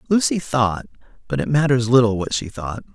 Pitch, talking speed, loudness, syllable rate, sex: 120 Hz, 165 wpm, -19 LUFS, 5.4 syllables/s, male